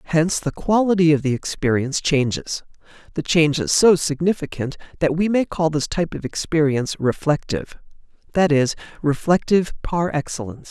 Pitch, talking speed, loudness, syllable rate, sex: 160 Hz, 140 wpm, -20 LUFS, 5.7 syllables/s, male